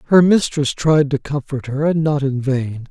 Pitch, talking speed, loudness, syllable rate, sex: 145 Hz, 205 wpm, -17 LUFS, 4.5 syllables/s, male